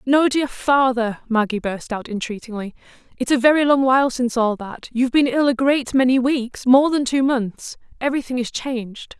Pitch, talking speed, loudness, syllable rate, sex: 250 Hz, 185 wpm, -19 LUFS, 5.3 syllables/s, female